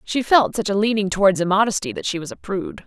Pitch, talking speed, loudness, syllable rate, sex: 205 Hz, 250 wpm, -20 LUFS, 6.6 syllables/s, female